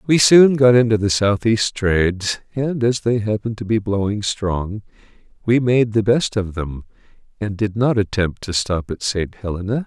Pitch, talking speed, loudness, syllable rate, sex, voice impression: 105 Hz, 180 wpm, -18 LUFS, 4.6 syllables/s, male, very masculine, very adult-like, very middle-aged, very thick, tensed, powerful, bright, soft, very clear, fluent, very cool, very intellectual, sincere, very calm, very mature, very friendly, very reassuring, unique, very elegant, slightly wild, sweet, slightly lively, very kind, slightly modest